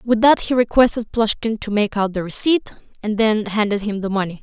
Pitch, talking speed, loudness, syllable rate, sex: 215 Hz, 215 wpm, -18 LUFS, 5.4 syllables/s, female